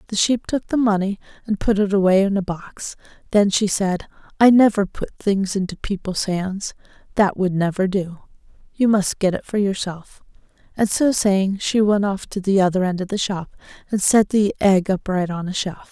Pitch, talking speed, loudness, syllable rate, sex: 195 Hz, 190 wpm, -20 LUFS, 4.8 syllables/s, female